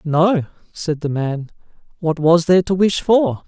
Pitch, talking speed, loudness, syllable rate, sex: 165 Hz, 175 wpm, -17 LUFS, 4.3 syllables/s, male